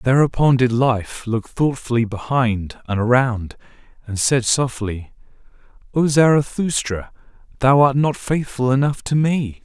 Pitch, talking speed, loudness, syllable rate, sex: 125 Hz, 125 wpm, -19 LUFS, 4.2 syllables/s, male